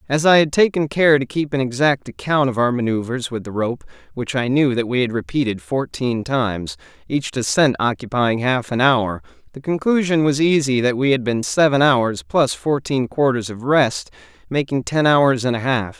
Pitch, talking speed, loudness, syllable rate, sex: 130 Hz, 195 wpm, -18 LUFS, 4.9 syllables/s, male